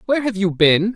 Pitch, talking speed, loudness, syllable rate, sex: 205 Hz, 255 wpm, -17 LUFS, 6.2 syllables/s, male